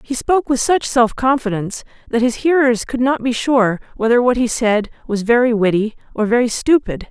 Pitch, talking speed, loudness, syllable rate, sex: 240 Hz, 195 wpm, -16 LUFS, 5.3 syllables/s, female